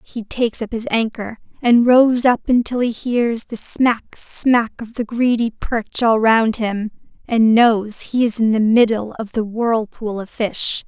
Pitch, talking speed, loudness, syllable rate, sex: 230 Hz, 180 wpm, -17 LUFS, 3.9 syllables/s, female